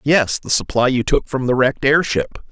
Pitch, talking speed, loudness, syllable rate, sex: 130 Hz, 215 wpm, -17 LUFS, 5.1 syllables/s, male